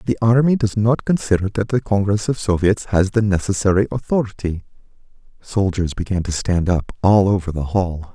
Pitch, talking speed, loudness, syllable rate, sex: 100 Hz, 170 wpm, -19 LUFS, 5.2 syllables/s, male